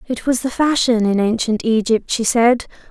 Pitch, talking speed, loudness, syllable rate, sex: 230 Hz, 185 wpm, -17 LUFS, 4.7 syllables/s, female